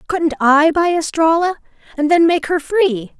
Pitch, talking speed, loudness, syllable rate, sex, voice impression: 320 Hz, 170 wpm, -15 LUFS, 4.4 syllables/s, female, very feminine, young, slightly adult-like, very thin, slightly tensed, slightly weak, bright, slightly soft, slightly clear, slightly fluent, very cute, intellectual, refreshing, sincere, very calm, friendly, reassuring, very unique, elegant, sweet, slightly lively, kind, slightly intense, sharp, slightly modest, light